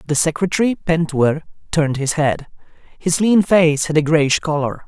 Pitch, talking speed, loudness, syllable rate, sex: 160 Hz, 160 wpm, -17 LUFS, 4.9 syllables/s, male